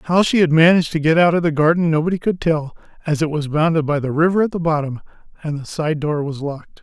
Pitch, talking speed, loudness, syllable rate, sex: 160 Hz, 255 wpm, -18 LUFS, 6.4 syllables/s, male